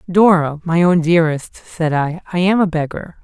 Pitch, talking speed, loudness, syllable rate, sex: 170 Hz, 185 wpm, -16 LUFS, 4.8 syllables/s, male